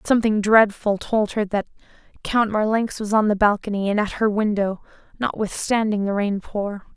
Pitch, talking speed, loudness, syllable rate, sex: 210 Hz, 165 wpm, -21 LUFS, 4.9 syllables/s, female